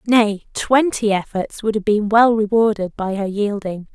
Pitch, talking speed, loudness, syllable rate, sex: 210 Hz, 165 wpm, -18 LUFS, 4.4 syllables/s, female